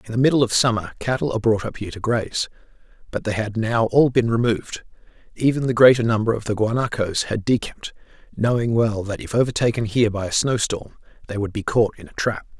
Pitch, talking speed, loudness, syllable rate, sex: 115 Hz, 215 wpm, -21 LUFS, 6.3 syllables/s, male